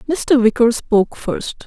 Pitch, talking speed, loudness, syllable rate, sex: 250 Hz, 145 wpm, -16 LUFS, 4.1 syllables/s, female